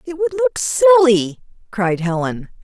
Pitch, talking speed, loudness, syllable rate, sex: 200 Hz, 135 wpm, -16 LUFS, 6.7 syllables/s, female